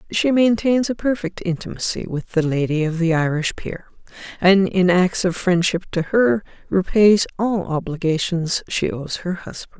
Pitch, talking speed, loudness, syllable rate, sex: 180 Hz, 160 wpm, -19 LUFS, 4.6 syllables/s, female